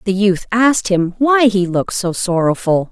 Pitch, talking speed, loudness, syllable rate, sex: 200 Hz, 185 wpm, -15 LUFS, 4.8 syllables/s, female